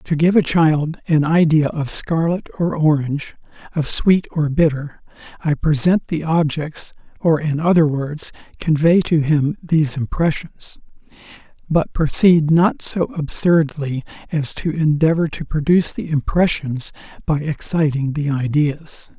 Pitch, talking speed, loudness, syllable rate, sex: 155 Hz, 135 wpm, -18 LUFS, 4.2 syllables/s, male